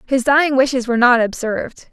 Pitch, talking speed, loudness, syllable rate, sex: 255 Hz, 190 wpm, -16 LUFS, 6.3 syllables/s, female